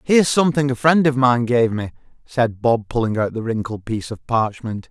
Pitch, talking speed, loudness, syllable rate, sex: 120 Hz, 210 wpm, -19 LUFS, 5.4 syllables/s, male